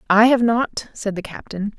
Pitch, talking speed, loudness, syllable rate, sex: 215 Hz, 200 wpm, -19 LUFS, 4.5 syllables/s, female